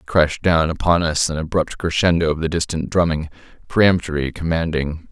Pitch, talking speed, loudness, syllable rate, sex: 80 Hz, 155 wpm, -19 LUFS, 5.5 syllables/s, male